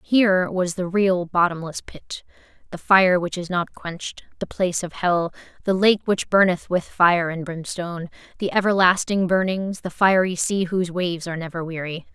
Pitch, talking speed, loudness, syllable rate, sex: 180 Hz, 175 wpm, -21 LUFS, 5.0 syllables/s, female